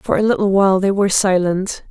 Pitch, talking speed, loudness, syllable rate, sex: 195 Hz, 220 wpm, -16 LUFS, 6.0 syllables/s, female